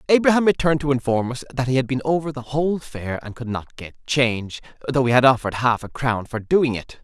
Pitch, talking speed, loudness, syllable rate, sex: 130 Hz, 240 wpm, -21 LUFS, 6.0 syllables/s, male